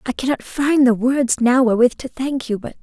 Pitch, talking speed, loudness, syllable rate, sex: 255 Hz, 235 wpm, -18 LUFS, 5.2 syllables/s, female